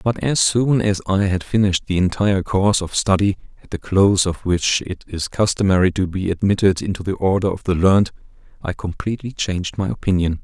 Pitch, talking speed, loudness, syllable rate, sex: 95 Hz, 195 wpm, -19 LUFS, 5.9 syllables/s, male